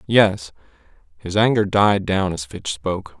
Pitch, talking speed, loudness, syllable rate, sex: 100 Hz, 150 wpm, -19 LUFS, 4.2 syllables/s, male